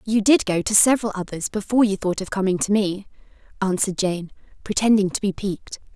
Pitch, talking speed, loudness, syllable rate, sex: 200 Hz, 190 wpm, -21 LUFS, 6.2 syllables/s, female